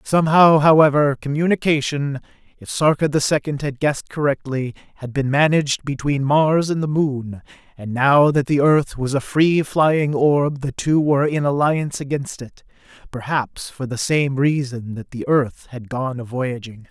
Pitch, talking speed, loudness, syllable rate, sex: 140 Hz, 165 wpm, -19 LUFS, 4.6 syllables/s, male